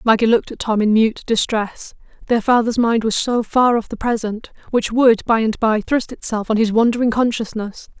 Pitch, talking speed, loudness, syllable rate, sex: 225 Hz, 205 wpm, -17 LUFS, 5.1 syllables/s, female